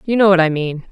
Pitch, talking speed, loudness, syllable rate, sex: 180 Hz, 330 wpm, -14 LUFS, 6.4 syllables/s, female